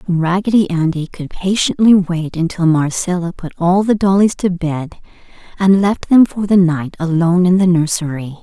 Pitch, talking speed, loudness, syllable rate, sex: 180 Hz, 165 wpm, -15 LUFS, 4.8 syllables/s, female